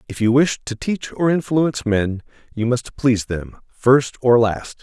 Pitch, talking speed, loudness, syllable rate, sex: 125 Hz, 185 wpm, -19 LUFS, 4.5 syllables/s, male